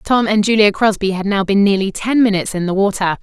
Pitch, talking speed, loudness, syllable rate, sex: 200 Hz, 240 wpm, -15 LUFS, 6.1 syllables/s, female